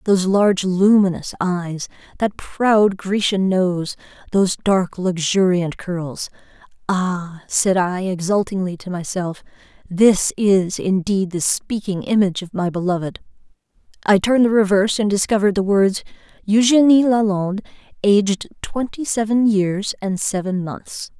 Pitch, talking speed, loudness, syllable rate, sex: 195 Hz, 110 wpm, -18 LUFS, 4.4 syllables/s, female